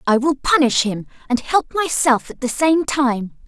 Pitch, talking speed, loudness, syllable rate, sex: 270 Hz, 190 wpm, -18 LUFS, 4.4 syllables/s, female